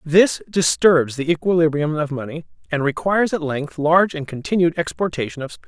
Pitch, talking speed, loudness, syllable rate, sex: 155 Hz, 170 wpm, -19 LUFS, 5.7 syllables/s, male